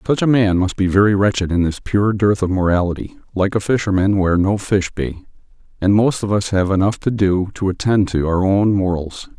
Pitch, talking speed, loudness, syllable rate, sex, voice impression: 100 Hz, 215 wpm, -17 LUFS, 5.3 syllables/s, male, very masculine, very adult-like, very middle-aged, very thick, tensed, very powerful, bright, slightly soft, slightly muffled, fluent, slightly raspy, very cool, intellectual, sincere, very calm, very mature, very friendly, very reassuring, slightly unique, wild, kind, slightly modest